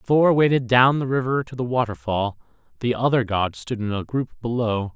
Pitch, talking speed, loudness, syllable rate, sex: 120 Hz, 195 wpm, -22 LUFS, 4.9 syllables/s, male